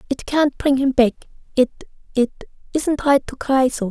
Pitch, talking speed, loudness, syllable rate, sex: 265 Hz, 155 wpm, -19 LUFS, 4.4 syllables/s, female